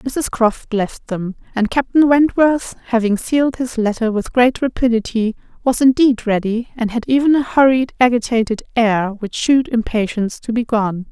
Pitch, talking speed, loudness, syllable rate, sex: 235 Hz, 160 wpm, -17 LUFS, 4.8 syllables/s, female